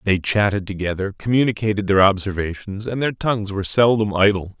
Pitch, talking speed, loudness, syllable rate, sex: 100 Hz, 155 wpm, -19 LUFS, 5.9 syllables/s, male